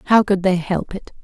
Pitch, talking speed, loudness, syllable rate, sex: 190 Hz, 245 wpm, -18 LUFS, 5.2 syllables/s, female